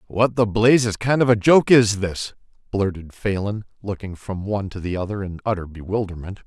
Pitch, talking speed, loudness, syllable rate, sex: 105 Hz, 185 wpm, -21 LUFS, 5.3 syllables/s, male